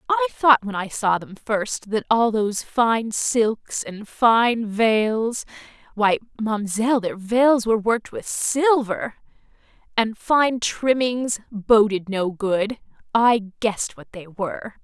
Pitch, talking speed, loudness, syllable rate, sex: 220 Hz, 125 wpm, -21 LUFS, 3.6 syllables/s, female